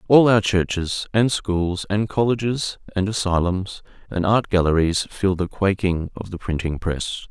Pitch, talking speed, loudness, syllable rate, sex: 95 Hz, 155 wpm, -21 LUFS, 4.3 syllables/s, male